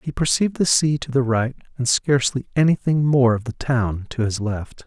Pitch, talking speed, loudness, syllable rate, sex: 130 Hz, 210 wpm, -20 LUFS, 5.2 syllables/s, male